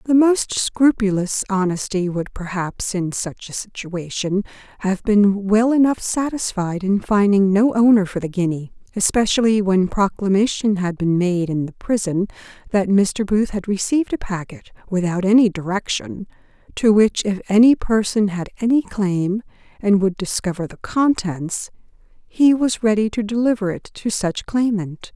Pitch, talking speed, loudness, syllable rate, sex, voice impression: 205 Hz, 150 wpm, -19 LUFS, 4.5 syllables/s, female, feminine, middle-aged, relaxed, slightly weak, soft, fluent, slightly raspy, intellectual, calm, friendly, reassuring, elegant, lively, kind, slightly modest